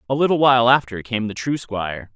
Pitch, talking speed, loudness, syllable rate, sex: 115 Hz, 220 wpm, -19 LUFS, 6.1 syllables/s, male